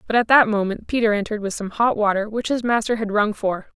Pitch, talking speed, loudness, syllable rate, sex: 215 Hz, 255 wpm, -20 LUFS, 6.2 syllables/s, female